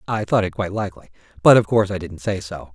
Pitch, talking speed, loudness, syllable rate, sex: 100 Hz, 260 wpm, -20 LUFS, 7.2 syllables/s, male